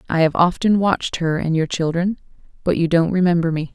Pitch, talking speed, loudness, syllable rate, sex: 170 Hz, 210 wpm, -19 LUFS, 5.7 syllables/s, female